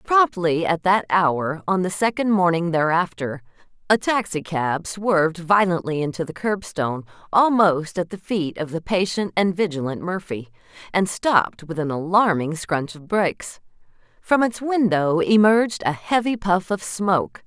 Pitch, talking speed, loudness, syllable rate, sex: 180 Hz, 150 wpm, -21 LUFS, 4.5 syllables/s, female